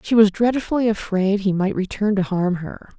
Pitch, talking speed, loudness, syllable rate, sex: 200 Hz, 200 wpm, -20 LUFS, 5.0 syllables/s, female